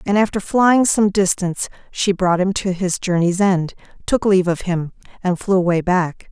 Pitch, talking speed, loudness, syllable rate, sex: 185 Hz, 190 wpm, -18 LUFS, 4.9 syllables/s, female